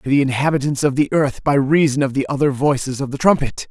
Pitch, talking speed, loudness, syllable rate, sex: 140 Hz, 245 wpm, -18 LUFS, 6.1 syllables/s, male